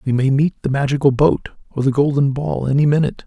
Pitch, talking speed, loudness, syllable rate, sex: 140 Hz, 220 wpm, -17 LUFS, 6.4 syllables/s, male